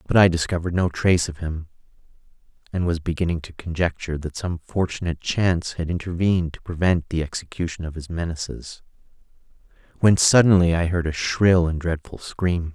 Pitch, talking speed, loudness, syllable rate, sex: 85 Hz, 160 wpm, -22 LUFS, 5.7 syllables/s, male